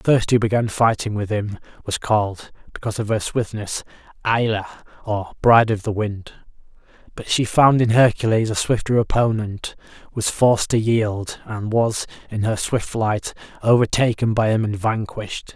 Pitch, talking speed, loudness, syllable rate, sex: 110 Hz, 160 wpm, -20 LUFS, 4.9 syllables/s, male